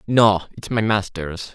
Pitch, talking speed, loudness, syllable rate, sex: 100 Hz, 155 wpm, -20 LUFS, 3.9 syllables/s, male